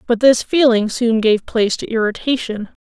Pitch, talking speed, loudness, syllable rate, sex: 235 Hz, 170 wpm, -16 LUFS, 5.0 syllables/s, female